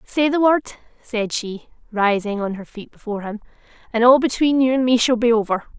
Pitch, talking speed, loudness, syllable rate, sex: 235 Hz, 205 wpm, -19 LUFS, 5.6 syllables/s, female